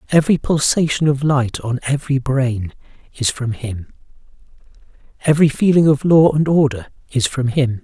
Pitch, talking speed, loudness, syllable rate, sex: 135 Hz, 145 wpm, -17 LUFS, 5.1 syllables/s, male